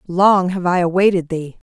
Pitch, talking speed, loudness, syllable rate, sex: 180 Hz, 175 wpm, -16 LUFS, 4.8 syllables/s, female